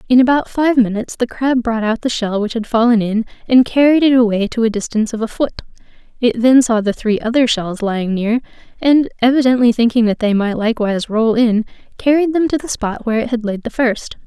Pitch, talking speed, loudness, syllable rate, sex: 235 Hz, 225 wpm, -15 LUFS, 5.9 syllables/s, female